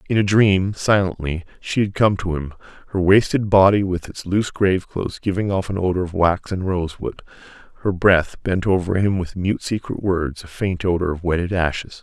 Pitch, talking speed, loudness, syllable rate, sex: 90 Hz, 195 wpm, -20 LUFS, 5.4 syllables/s, male